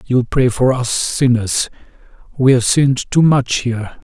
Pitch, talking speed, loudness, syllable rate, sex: 125 Hz, 160 wpm, -15 LUFS, 4.4 syllables/s, male